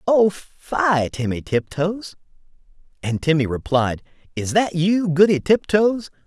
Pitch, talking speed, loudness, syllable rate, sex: 170 Hz, 115 wpm, -20 LUFS, 4.1 syllables/s, male